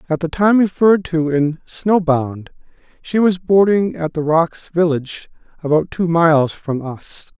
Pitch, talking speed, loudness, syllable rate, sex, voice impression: 165 Hz, 160 wpm, -16 LUFS, 4.3 syllables/s, male, masculine, middle-aged, relaxed, slightly weak, soft, muffled, intellectual, calm, friendly, reassuring, kind, modest